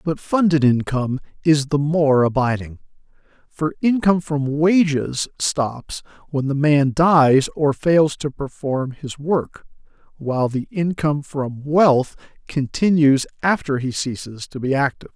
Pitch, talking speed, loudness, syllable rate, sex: 145 Hz, 135 wpm, -19 LUFS, 4.1 syllables/s, male